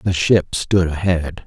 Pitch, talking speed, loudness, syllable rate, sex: 85 Hz, 165 wpm, -18 LUFS, 3.6 syllables/s, male